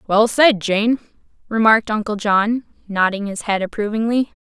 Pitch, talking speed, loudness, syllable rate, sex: 215 Hz, 135 wpm, -18 LUFS, 4.9 syllables/s, female